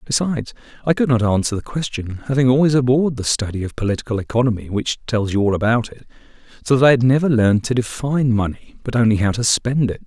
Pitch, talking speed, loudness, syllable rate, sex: 120 Hz, 215 wpm, -18 LUFS, 6.8 syllables/s, male